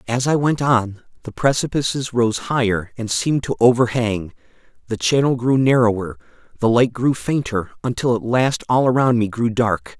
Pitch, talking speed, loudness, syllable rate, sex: 120 Hz, 170 wpm, -19 LUFS, 4.9 syllables/s, male